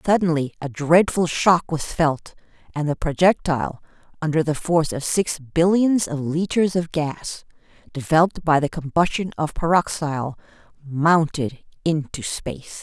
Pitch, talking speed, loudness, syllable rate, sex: 160 Hz, 130 wpm, -21 LUFS, 4.7 syllables/s, female